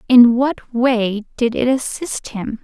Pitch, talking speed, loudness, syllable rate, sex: 240 Hz, 160 wpm, -17 LUFS, 3.5 syllables/s, female